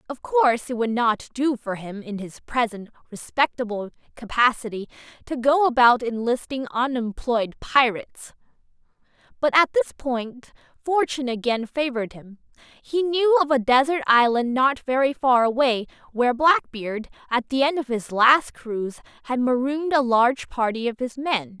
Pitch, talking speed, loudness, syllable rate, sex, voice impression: 250 Hz, 150 wpm, -22 LUFS, 4.8 syllables/s, female, very feminine, slightly young, slightly adult-like, very thin, very tensed, slightly powerful, very bright, slightly hard, very clear, slightly fluent, cute, slightly intellectual, refreshing, sincere, slightly friendly, slightly reassuring, very unique, wild, very lively, slightly kind, intense, slightly light